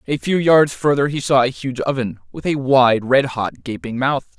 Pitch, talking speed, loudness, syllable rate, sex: 135 Hz, 220 wpm, -18 LUFS, 4.6 syllables/s, male